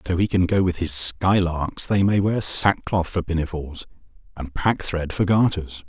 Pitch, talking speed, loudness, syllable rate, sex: 90 Hz, 175 wpm, -21 LUFS, 4.6 syllables/s, male